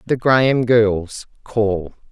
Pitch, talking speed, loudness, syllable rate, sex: 110 Hz, 115 wpm, -17 LUFS, 3.0 syllables/s, female